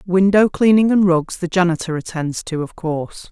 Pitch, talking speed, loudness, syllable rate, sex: 180 Hz, 180 wpm, -17 LUFS, 5.0 syllables/s, female